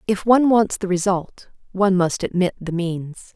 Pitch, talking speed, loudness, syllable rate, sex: 190 Hz, 180 wpm, -20 LUFS, 4.8 syllables/s, female